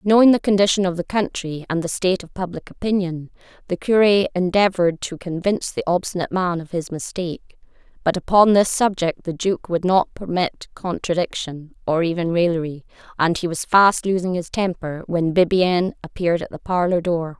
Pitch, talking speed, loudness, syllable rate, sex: 180 Hz, 175 wpm, -20 LUFS, 5.3 syllables/s, female